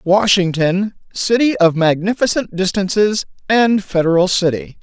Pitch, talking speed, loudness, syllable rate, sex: 195 Hz, 100 wpm, -15 LUFS, 4.3 syllables/s, male